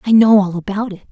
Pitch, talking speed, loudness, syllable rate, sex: 200 Hz, 270 wpm, -14 LUFS, 6.6 syllables/s, female